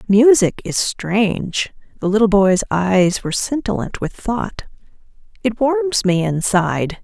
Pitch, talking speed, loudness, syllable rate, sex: 205 Hz, 130 wpm, -17 LUFS, 4.0 syllables/s, female